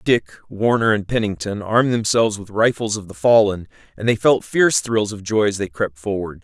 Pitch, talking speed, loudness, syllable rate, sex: 110 Hz, 205 wpm, -19 LUFS, 5.5 syllables/s, male